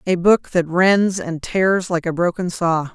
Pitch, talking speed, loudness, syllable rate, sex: 175 Hz, 205 wpm, -18 LUFS, 3.9 syllables/s, female